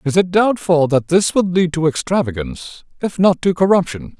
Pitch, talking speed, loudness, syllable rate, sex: 170 Hz, 185 wpm, -16 LUFS, 5.1 syllables/s, male